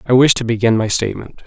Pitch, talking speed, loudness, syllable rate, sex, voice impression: 120 Hz, 245 wpm, -15 LUFS, 6.7 syllables/s, male, very masculine, very adult-like, slightly old, very thick, tensed, very powerful, slightly bright, hard, muffled, slightly fluent, raspy, very cool, intellectual, slightly refreshing, sincere, very calm, very mature, very friendly, very reassuring, unique, elegant, wild, slightly sweet, slightly lively, very kind, slightly modest